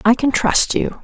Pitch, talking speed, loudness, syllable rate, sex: 250 Hz, 235 wpm, -16 LUFS, 4.4 syllables/s, female